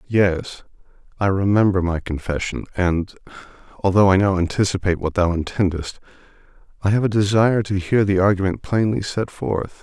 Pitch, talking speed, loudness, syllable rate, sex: 95 Hz, 145 wpm, -20 LUFS, 5.3 syllables/s, male